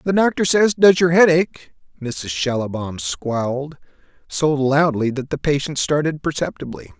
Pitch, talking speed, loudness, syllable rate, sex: 145 Hz, 145 wpm, -19 LUFS, 4.5 syllables/s, male